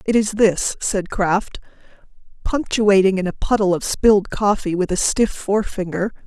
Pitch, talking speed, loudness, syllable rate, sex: 200 Hz, 155 wpm, -19 LUFS, 4.7 syllables/s, female